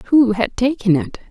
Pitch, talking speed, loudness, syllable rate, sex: 220 Hz, 185 wpm, -17 LUFS, 5.2 syllables/s, female